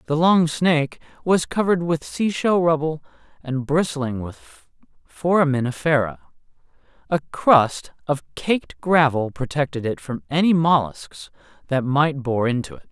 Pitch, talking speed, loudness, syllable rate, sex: 145 Hz, 125 wpm, -21 LUFS, 4.4 syllables/s, male